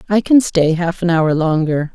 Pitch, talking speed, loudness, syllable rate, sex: 170 Hz, 215 wpm, -15 LUFS, 4.5 syllables/s, female